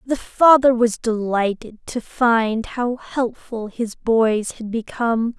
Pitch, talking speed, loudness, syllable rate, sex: 230 Hz, 135 wpm, -19 LUFS, 3.5 syllables/s, female